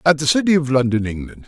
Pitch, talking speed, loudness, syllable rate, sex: 135 Hz, 245 wpm, -17 LUFS, 6.6 syllables/s, male